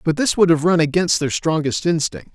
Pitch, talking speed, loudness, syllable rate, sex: 165 Hz, 230 wpm, -18 LUFS, 5.4 syllables/s, male